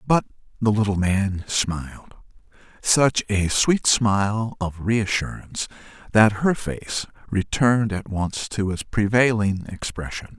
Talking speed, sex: 135 wpm, male